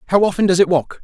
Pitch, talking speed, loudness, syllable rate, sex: 180 Hz, 290 wpm, -15 LUFS, 7.6 syllables/s, male